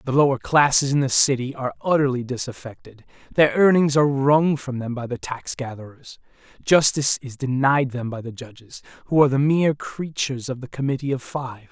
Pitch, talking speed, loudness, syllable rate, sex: 135 Hz, 185 wpm, -21 LUFS, 5.7 syllables/s, male